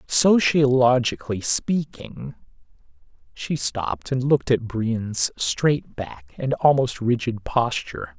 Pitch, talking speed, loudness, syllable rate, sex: 120 Hz, 105 wpm, -21 LUFS, 3.7 syllables/s, male